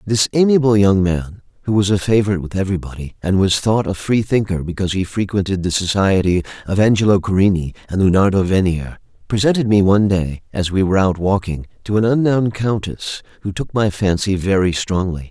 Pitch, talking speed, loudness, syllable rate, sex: 100 Hz, 180 wpm, -17 LUFS, 5.8 syllables/s, male